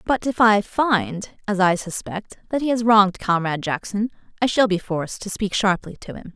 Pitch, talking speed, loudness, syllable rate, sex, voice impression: 200 Hz, 210 wpm, -21 LUFS, 5.1 syllables/s, female, feminine, adult-like, tensed, powerful, slightly hard, clear, fluent, intellectual, slightly friendly, elegant, lively, slightly strict, slightly sharp